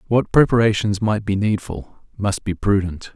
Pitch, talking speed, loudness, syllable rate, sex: 105 Hz, 150 wpm, -19 LUFS, 4.6 syllables/s, male